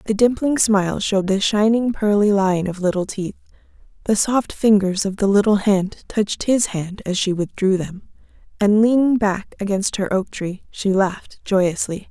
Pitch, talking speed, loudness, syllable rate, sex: 200 Hz, 175 wpm, -19 LUFS, 4.7 syllables/s, female